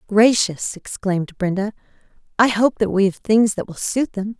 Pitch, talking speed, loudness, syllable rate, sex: 205 Hz, 175 wpm, -19 LUFS, 4.9 syllables/s, female